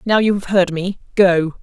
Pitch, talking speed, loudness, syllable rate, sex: 190 Hz, 220 wpm, -16 LUFS, 4.5 syllables/s, female